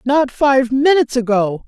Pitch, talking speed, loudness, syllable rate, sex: 260 Hz, 145 wpm, -15 LUFS, 4.5 syllables/s, female